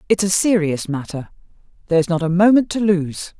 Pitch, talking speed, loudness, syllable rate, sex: 180 Hz, 175 wpm, -17 LUFS, 5.7 syllables/s, female